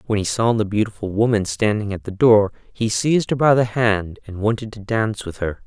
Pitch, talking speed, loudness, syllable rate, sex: 110 Hz, 235 wpm, -19 LUFS, 5.4 syllables/s, male